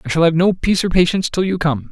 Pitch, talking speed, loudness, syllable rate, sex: 175 Hz, 315 wpm, -16 LUFS, 7.3 syllables/s, male